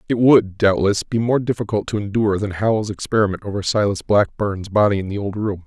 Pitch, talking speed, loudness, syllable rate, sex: 105 Hz, 200 wpm, -19 LUFS, 5.8 syllables/s, male